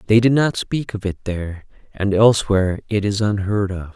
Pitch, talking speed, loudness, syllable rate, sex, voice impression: 105 Hz, 195 wpm, -19 LUFS, 5.3 syllables/s, male, masculine, adult-like, relaxed, weak, dark, slightly soft, muffled, intellectual, sincere, calm, reassuring, kind, modest